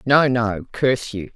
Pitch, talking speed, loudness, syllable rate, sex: 120 Hz, 180 wpm, -20 LUFS, 4.2 syllables/s, female